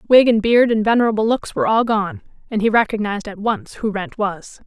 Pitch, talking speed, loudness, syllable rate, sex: 215 Hz, 220 wpm, -18 LUFS, 5.7 syllables/s, female